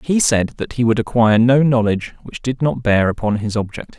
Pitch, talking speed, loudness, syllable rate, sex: 115 Hz, 225 wpm, -17 LUFS, 5.5 syllables/s, male